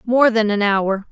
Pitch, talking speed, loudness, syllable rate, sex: 215 Hz, 215 wpm, -17 LUFS, 4.0 syllables/s, female